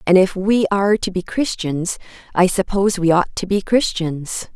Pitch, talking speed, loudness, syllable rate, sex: 190 Hz, 185 wpm, -18 LUFS, 4.9 syllables/s, female